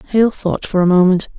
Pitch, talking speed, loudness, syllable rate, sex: 190 Hz, 215 wpm, -15 LUFS, 5.6 syllables/s, female